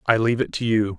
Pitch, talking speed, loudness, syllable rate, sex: 115 Hz, 305 wpm, -21 LUFS, 6.9 syllables/s, male